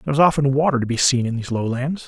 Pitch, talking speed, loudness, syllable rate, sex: 135 Hz, 290 wpm, -19 LUFS, 7.7 syllables/s, male